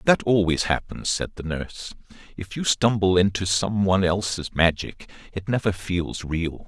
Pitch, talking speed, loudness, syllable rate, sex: 95 Hz, 160 wpm, -23 LUFS, 4.6 syllables/s, male